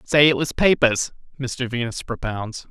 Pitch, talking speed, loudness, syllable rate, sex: 130 Hz, 155 wpm, -21 LUFS, 4.3 syllables/s, male